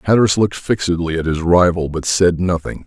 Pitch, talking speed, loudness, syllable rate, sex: 90 Hz, 190 wpm, -16 LUFS, 5.9 syllables/s, male